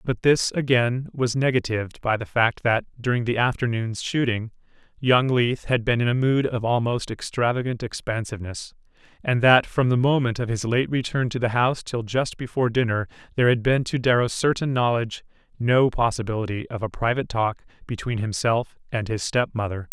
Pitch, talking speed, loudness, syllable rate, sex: 120 Hz, 180 wpm, -23 LUFS, 5.4 syllables/s, male